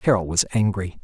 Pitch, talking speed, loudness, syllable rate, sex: 100 Hz, 175 wpm, -21 LUFS, 5.4 syllables/s, male